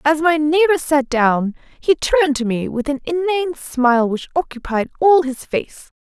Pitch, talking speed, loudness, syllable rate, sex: 290 Hz, 180 wpm, -18 LUFS, 4.6 syllables/s, female